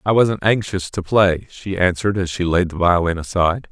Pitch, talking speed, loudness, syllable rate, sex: 95 Hz, 210 wpm, -18 LUFS, 5.3 syllables/s, male